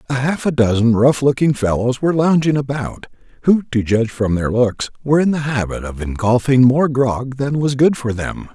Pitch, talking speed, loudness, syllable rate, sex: 130 Hz, 205 wpm, -17 LUFS, 5.2 syllables/s, male